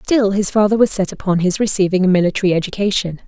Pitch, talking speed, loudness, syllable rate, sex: 195 Hz, 200 wpm, -16 LUFS, 6.7 syllables/s, female